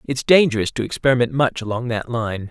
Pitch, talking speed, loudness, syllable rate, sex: 120 Hz, 190 wpm, -19 LUFS, 5.8 syllables/s, male